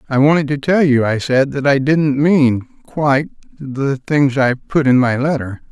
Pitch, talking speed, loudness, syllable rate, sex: 140 Hz, 200 wpm, -15 LUFS, 4.2 syllables/s, male